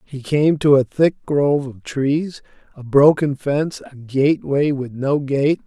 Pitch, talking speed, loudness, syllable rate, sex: 140 Hz, 170 wpm, -18 LUFS, 4.2 syllables/s, male